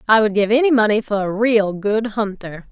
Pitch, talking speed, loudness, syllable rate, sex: 215 Hz, 220 wpm, -17 LUFS, 5.1 syllables/s, female